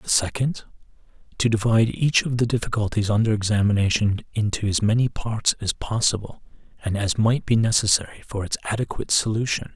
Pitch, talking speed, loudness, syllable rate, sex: 110 Hz, 155 wpm, -22 LUFS, 5.8 syllables/s, male